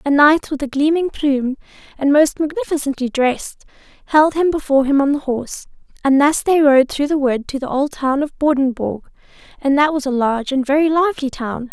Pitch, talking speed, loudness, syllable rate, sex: 280 Hz, 200 wpm, -17 LUFS, 5.7 syllables/s, female